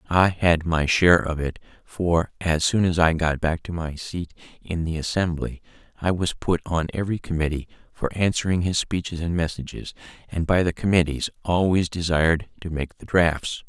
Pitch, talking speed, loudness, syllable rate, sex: 85 Hz, 180 wpm, -23 LUFS, 5.0 syllables/s, male